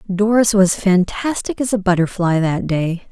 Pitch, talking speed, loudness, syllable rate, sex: 190 Hz, 155 wpm, -17 LUFS, 4.5 syllables/s, female